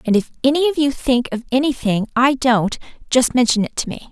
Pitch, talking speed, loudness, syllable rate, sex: 255 Hz, 220 wpm, -18 LUFS, 5.7 syllables/s, female